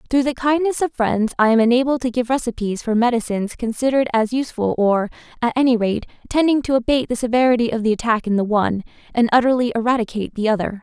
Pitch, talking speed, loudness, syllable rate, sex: 240 Hz, 200 wpm, -19 LUFS, 6.8 syllables/s, female